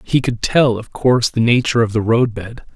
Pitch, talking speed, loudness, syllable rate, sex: 115 Hz, 220 wpm, -16 LUFS, 5.5 syllables/s, male